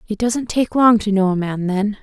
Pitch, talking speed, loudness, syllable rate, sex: 210 Hz, 265 wpm, -17 LUFS, 4.9 syllables/s, female